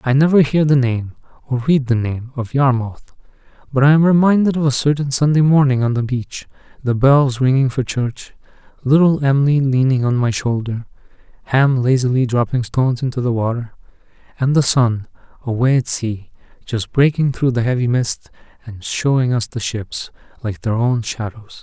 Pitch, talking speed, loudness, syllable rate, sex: 130 Hz, 170 wpm, -17 LUFS, 5.0 syllables/s, male